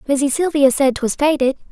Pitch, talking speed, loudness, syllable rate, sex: 280 Hz, 175 wpm, -16 LUFS, 5.6 syllables/s, female